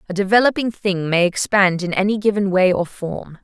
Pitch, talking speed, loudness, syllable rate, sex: 195 Hz, 190 wpm, -18 LUFS, 5.2 syllables/s, female